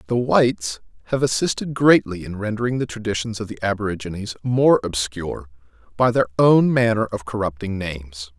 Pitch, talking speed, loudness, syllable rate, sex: 105 Hz, 150 wpm, -20 LUFS, 5.5 syllables/s, male